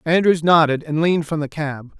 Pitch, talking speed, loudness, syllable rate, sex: 160 Hz, 210 wpm, -18 LUFS, 5.4 syllables/s, male